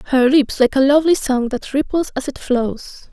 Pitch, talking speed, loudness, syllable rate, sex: 270 Hz, 210 wpm, -17 LUFS, 5.0 syllables/s, female